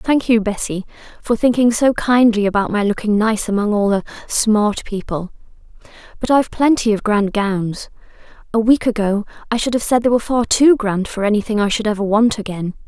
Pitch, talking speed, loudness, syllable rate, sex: 215 Hz, 185 wpm, -17 LUFS, 5.4 syllables/s, female